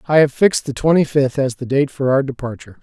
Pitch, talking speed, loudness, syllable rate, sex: 135 Hz, 255 wpm, -17 LUFS, 6.4 syllables/s, male